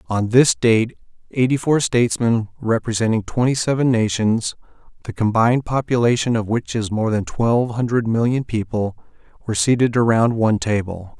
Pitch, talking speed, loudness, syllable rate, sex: 115 Hz, 145 wpm, -19 LUFS, 5.2 syllables/s, male